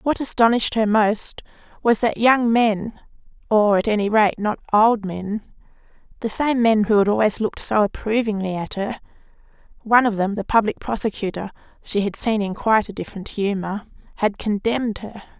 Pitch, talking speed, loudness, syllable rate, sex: 215 Hz, 155 wpm, -20 LUFS, 3.9 syllables/s, female